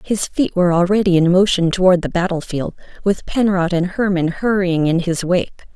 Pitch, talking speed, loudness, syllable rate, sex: 180 Hz, 175 wpm, -17 LUFS, 5.2 syllables/s, female